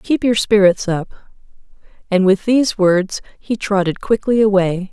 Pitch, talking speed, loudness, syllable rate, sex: 200 Hz, 145 wpm, -16 LUFS, 4.3 syllables/s, female